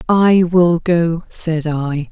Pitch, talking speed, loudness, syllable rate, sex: 170 Hz, 140 wpm, -15 LUFS, 2.6 syllables/s, female